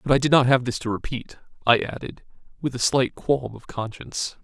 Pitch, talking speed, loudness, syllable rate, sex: 125 Hz, 215 wpm, -23 LUFS, 5.4 syllables/s, male